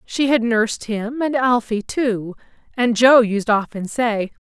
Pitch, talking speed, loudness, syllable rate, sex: 230 Hz, 160 wpm, -18 LUFS, 3.9 syllables/s, female